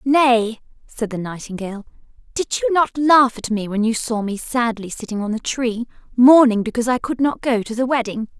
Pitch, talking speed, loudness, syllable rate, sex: 235 Hz, 200 wpm, -19 LUFS, 5.2 syllables/s, female